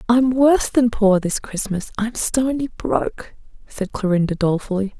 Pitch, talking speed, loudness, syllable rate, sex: 220 Hz, 145 wpm, -19 LUFS, 4.8 syllables/s, female